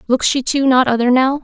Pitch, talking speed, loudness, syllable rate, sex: 260 Hz, 250 wpm, -14 LUFS, 5.5 syllables/s, female